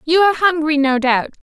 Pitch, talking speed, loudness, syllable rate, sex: 305 Hz, 190 wpm, -15 LUFS, 5.8 syllables/s, female